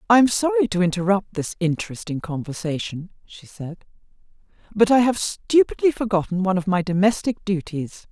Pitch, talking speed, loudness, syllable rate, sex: 195 Hz, 150 wpm, -21 LUFS, 5.4 syllables/s, female